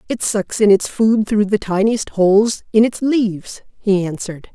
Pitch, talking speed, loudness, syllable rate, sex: 205 Hz, 185 wpm, -16 LUFS, 4.6 syllables/s, female